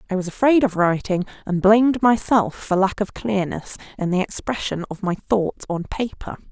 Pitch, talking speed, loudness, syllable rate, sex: 200 Hz, 185 wpm, -21 LUFS, 5.0 syllables/s, female